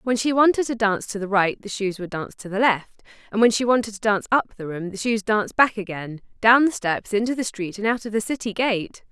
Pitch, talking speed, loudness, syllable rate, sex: 215 Hz, 270 wpm, -22 LUFS, 6.1 syllables/s, female